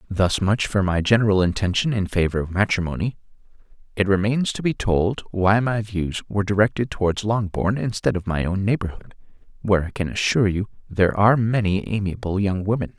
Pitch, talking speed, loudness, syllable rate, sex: 100 Hz, 175 wpm, -21 LUFS, 5.7 syllables/s, male